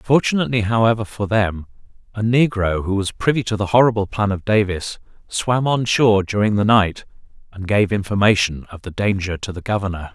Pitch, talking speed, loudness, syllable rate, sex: 105 Hz, 175 wpm, -18 LUFS, 5.5 syllables/s, male